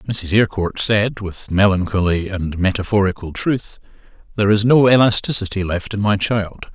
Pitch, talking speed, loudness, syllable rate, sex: 100 Hz, 140 wpm, -17 LUFS, 4.9 syllables/s, male